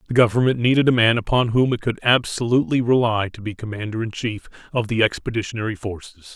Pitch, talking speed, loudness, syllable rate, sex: 115 Hz, 190 wpm, -20 LUFS, 6.1 syllables/s, male